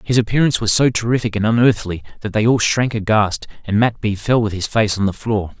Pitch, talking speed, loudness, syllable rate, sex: 110 Hz, 235 wpm, -17 LUFS, 5.8 syllables/s, male